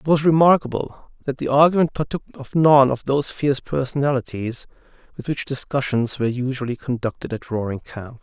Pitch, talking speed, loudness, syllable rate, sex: 135 Hz, 160 wpm, -20 LUFS, 5.6 syllables/s, male